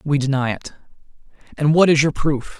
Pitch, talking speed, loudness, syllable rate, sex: 145 Hz, 185 wpm, -18 LUFS, 5.3 syllables/s, male